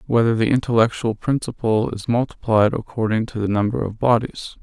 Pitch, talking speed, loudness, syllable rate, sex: 115 Hz, 155 wpm, -20 LUFS, 5.5 syllables/s, male